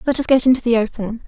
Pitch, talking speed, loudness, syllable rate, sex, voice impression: 240 Hz, 285 wpm, -16 LUFS, 7.1 syllables/s, female, feminine, slightly young, slightly adult-like, thin, slightly relaxed, slightly weak, slightly dark, slightly hard, slightly muffled, fluent, slightly raspy, cute, slightly intellectual, slightly refreshing, sincere, slightly calm, slightly friendly, slightly reassuring, slightly elegant, slightly sweet, slightly kind, slightly modest